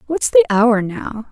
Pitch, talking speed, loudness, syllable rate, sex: 240 Hz, 185 wpm, -15 LUFS, 3.8 syllables/s, female